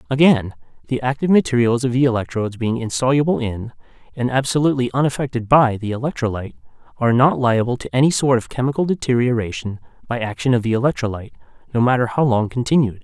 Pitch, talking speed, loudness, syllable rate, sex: 120 Hz, 155 wpm, -19 LUFS, 6.8 syllables/s, male